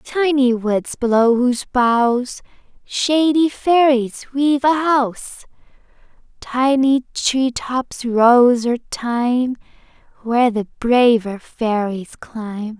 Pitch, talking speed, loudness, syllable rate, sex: 250 Hz, 100 wpm, -17 LUFS, 3.2 syllables/s, female